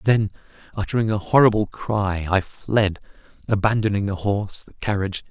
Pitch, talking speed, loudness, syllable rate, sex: 100 Hz, 135 wpm, -22 LUFS, 5.3 syllables/s, male